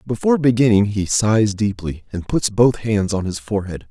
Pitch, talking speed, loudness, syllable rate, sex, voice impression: 105 Hz, 185 wpm, -18 LUFS, 5.1 syllables/s, male, masculine, adult-like, very middle-aged, thick, tensed, powerful, very bright, soft, clear, slightly fluent, cool, intellectual, very refreshing, slightly calm, friendly, reassuring, very unique, slightly elegant, wild, very lively, slightly kind, intense